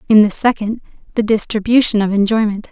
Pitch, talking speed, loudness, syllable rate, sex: 215 Hz, 155 wpm, -15 LUFS, 6.0 syllables/s, female